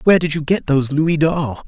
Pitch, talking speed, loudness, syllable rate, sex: 155 Hz, 250 wpm, -17 LUFS, 6.0 syllables/s, male